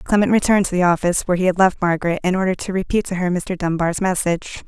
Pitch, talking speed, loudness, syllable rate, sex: 185 Hz, 245 wpm, -19 LUFS, 7.1 syllables/s, female